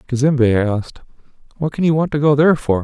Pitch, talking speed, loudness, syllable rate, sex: 135 Hz, 210 wpm, -16 LUFS, 6.5 syllables/s, male